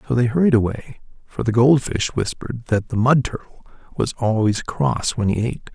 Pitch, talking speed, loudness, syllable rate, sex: 120 Hz, 200 wpm, -20 LUFS, 5.4 syllables/s, male